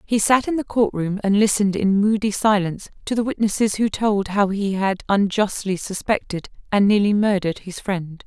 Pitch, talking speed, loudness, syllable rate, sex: 205 Hz, 190 wpm, -20 LUFS, 5.2 syllables/s, female